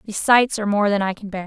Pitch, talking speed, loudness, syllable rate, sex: 205 Hz, 330 wpm, -18 LUFS, 7.5 syllables/s, female